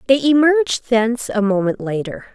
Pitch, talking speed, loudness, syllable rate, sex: 230 Hz, 155 wpm, -17 LUFS, 5.3 syllables/s, female